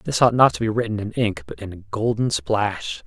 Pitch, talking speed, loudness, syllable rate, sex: 100 Hz, 255 wpm, -21 LUFS, 5.0 syllables/s, male